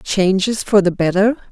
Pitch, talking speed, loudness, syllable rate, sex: 200 Hz, 160 wpm, -16 LUFS, 4.5 syllables/s, female